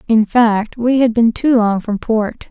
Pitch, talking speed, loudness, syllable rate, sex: 225 Hz, 215 wpm, -14 LUFS, 3.9 syllables/s, female